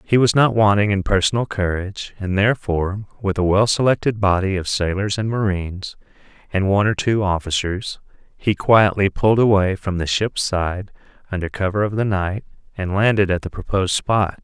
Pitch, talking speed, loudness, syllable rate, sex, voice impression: 100 Hz, 175 wpm, -19 LUFS, 5.4 syllables/s, male, masculine, adult-like, slightly thick, cool, sincere, calm, slightly kind